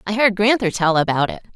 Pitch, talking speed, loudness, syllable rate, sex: 200 Hz, 230 wpm, -18 LUFS, 5.9 syllables/s, female